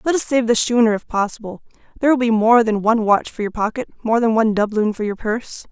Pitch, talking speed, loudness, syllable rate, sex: 225 Hz, 250 wpm, -18 LUFS, 6.6 syllables/s, female